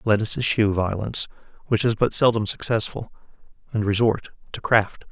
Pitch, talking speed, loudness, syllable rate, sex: 110 Hz, 155 wpm, -22 LUFS, 5.4 syllables/s, male